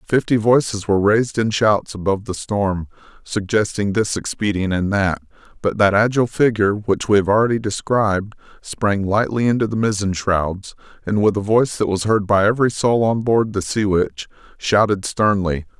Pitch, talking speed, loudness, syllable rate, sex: 105 Hz, 175 wpm, -18 LUFS, 5.2 syllables/s, male